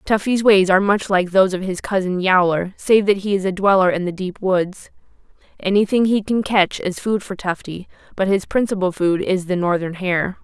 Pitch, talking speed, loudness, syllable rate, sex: 190 Hz, 205 wpm, -18 LUFS, 5.1 syllables/s, female